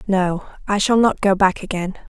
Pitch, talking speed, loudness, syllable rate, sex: 195 Hz, 195 wpm, -19 LUFS, 4.9 syllables/s, female